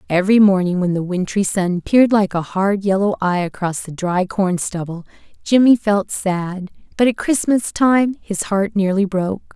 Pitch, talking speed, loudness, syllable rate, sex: 195 Hz, 175 wpm, -17 LUFS, 4.6 syllables/s, female